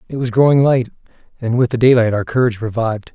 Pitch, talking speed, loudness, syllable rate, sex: 120 Hz, 210 wpm, -15 LUFS, 6.9 syllables/s, male